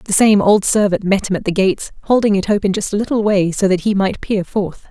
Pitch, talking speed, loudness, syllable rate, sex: 200 Hz, 270 wpm, -16 LUFS, 5.7 syllables/s, female